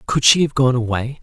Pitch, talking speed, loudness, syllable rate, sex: 130 Hz, 245 wpm, -16 LUFS, 5.5 syllables/s, male